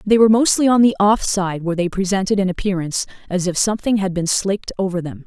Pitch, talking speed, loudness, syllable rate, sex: 195 Hz, 230 wpm, -18 LUFS, 6.6 syllables/s, female